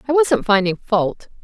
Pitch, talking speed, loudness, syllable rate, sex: 225 Hz, 165 wpm, -18 LUFS, 4.3 syllables/s, female